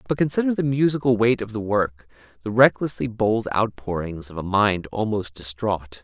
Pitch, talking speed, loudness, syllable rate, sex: 110 Hz, 170 wpm, -22 LUFS, 4.9 syllables/s, male